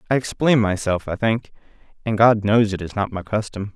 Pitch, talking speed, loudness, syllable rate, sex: 105 Hz, 210 wpm, -20 LUFS, 5.3 syllables/s, male